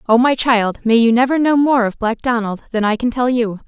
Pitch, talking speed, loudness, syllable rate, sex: 235 Hz, 260 wpm, -16 LUFS, 5.3 syllables/s, female